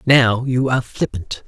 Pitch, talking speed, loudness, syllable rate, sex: 120 Hz, 165 wpm, -18 LUFS, 4.5 syllables/s, male